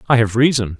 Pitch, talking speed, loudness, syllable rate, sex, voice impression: 115 Hz, 230 wpm, -15 LUFS, 6.6 syllables/s, male, masculine, middle-aged, tensed, powerful, hard, cool, intellectual, calm, mature, slightly friendly, reassuring, wild, lively, slightly strict